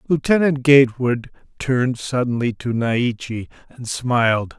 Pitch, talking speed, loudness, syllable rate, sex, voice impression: 125 Hz, 105 wpm, -19 LUFS, 4.5 syllables/s, male, masculine, very adult-like, middle-aged, very thick, slightly tensed, slightly powerful, slightly dark, hard, slightly muffled, slightly fluent, slightly cool, sincere, very calm, mature, slightly friendly, slightly unique, wild, slightly lively, kind, modest